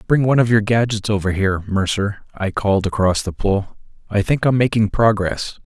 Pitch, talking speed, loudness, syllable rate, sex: 105 Hz, 190 wpm, -18 LUFS, 5.5 syllables/s, male